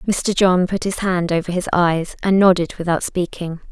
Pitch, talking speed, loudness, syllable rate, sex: 180 Hz, 195 wpm, -18 LUFS, 4.6 syllables/s, female